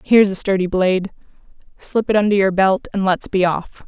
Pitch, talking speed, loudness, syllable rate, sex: 195 Hz, 200 wpm, -17 LUFS, 5.5 syllables/s, female